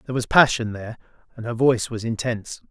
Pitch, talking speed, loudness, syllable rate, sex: 115 Hz, 200 wpm, -21 LUFS, 7.2 syllables/s, male